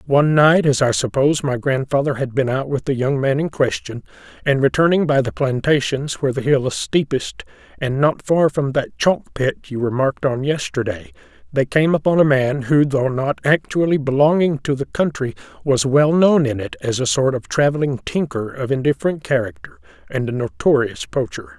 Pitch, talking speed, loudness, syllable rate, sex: 140 Hz, 190 wpm, -18 LUFS, 5.2 syllables/s, male